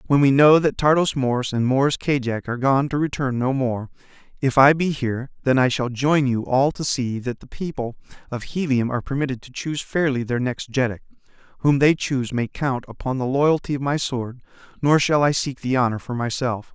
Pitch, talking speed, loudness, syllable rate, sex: 135 Hz, 210 wpm, -21 LUFS, 5.3 syllables/s, male